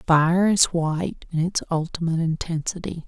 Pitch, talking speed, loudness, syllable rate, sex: 170 Hz, 135 wpm, -23 LUFS, 5.0 syllables/s, female